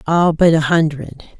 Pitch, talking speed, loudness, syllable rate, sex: 160 Hz, 170 wpm, -14 LUFS, 4.5 syllables/s, female